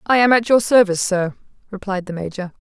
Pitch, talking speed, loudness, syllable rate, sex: 200 Hz, 205 wpm, -17 LUFS, 6.2 syllables/s, female